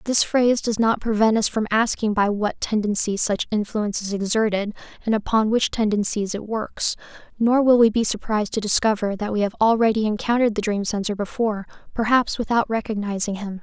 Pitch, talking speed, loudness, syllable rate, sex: 215 Hz, 180 wpm, -21 LUFS, 5.7 syllables/s, female